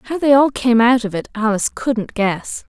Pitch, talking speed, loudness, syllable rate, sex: 235 Hz, 220 wpm, -16 LUFS, 4.7 syllables/s, female